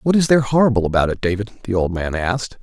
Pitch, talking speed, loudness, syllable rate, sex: 110 Hz, 250 wpm, -18 LUFS, 6.9 syllables/s, male